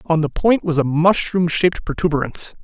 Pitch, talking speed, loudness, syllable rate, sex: 165 Hz, 180 wpm, -18 LUFS, 5.7 syllables/s, male